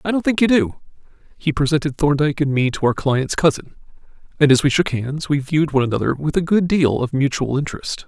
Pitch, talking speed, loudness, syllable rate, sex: 145 Hz, 225 wpm, -18 LUFS, 6.3 syllables/s, male